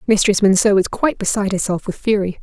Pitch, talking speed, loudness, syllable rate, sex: 200 Hz, 200 wpm, -17 LUFS, 6.6 syllables/s, female